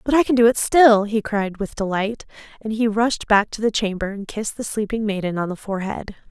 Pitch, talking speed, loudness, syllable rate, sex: 210 Hz, 240 wpm, -20 LUFS, 5.6 syllables/s, female